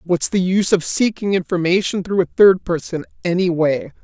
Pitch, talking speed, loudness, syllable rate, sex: 180 Hz, 165 wpm, -18 LUFS, 5.2 syllables/s, male